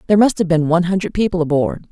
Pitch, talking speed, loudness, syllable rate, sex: 180 Hz, 250 wpm, -16 LUFS, 7.6 syllables/s, female